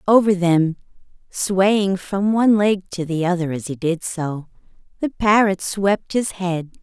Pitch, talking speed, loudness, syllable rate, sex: 185 Hz, 160 wpm, -19 LUFS, 4.0 syllables/s, female